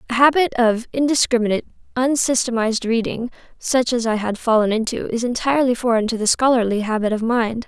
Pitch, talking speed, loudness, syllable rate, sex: 235 Hz, 165 wpm, -19 LUFS, 6.1 syllables/s, female